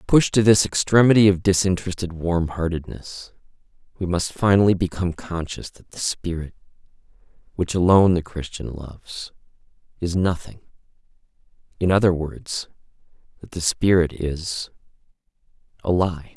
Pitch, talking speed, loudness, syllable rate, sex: 90 Hz, 115 wpm, -21 LUFS, 4.9 syllables/s, male